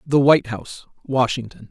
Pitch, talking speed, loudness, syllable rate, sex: 125 Hz, 140 wpm, -19 LUFS, 5.8 syllables/s, male